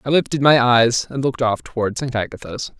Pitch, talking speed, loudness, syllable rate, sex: 125 Hz, 215 wpm, -18 LUFS, 5.7 syllables/s, male